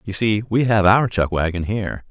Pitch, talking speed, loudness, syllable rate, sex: 100 Hz, 230 wpm, -19 LUFS, 5.2 syllables/s, male